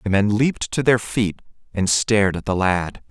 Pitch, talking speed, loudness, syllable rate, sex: 105 Hz, 210 wpm, -20 LUFS, 4.9 syllables/s, male